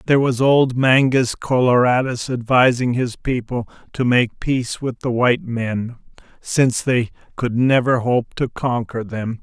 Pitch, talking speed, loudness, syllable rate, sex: 125 Hz, 145 wpm, -18 LUFS, 4.3 syllables/s, male